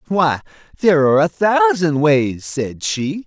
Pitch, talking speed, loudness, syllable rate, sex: 165 Hz, 145 wpm, -16 LUFS, 4.1 syllables/s, male